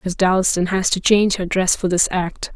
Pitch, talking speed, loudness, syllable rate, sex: 185 Hz, 235 wpm, -18 LUFS, 4.9 syllables/s, female